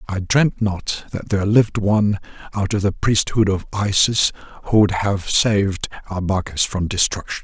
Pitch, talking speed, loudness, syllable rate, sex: 100 Hz, 160 wpm, -19 LUFS, 4.7 syllables/s, male